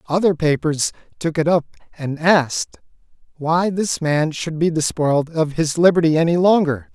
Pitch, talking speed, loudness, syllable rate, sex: 160 Hz, 155 wpm, -18 LUFS, 4.8 syllables/s, male